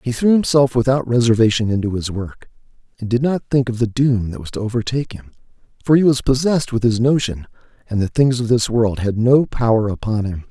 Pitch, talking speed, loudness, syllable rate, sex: 120 Hz, 215 wpm, -17 LUFS, 5.8 syllables/s, male